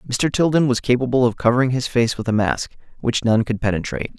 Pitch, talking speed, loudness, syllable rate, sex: 120 Hz, 215 wpm, -19 LUFS, 6.3 syllables/s, male